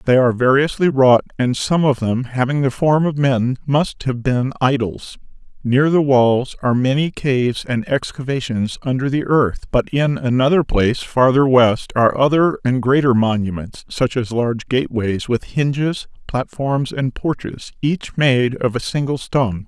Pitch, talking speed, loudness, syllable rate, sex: 130 Hz, 170 wpm, -17 LUFS, 4.5 syllables/s, male